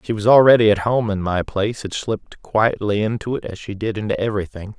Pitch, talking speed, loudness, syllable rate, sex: 105 Hz, 225 wpm, -19 LUFS, 6.0 syllables/s, male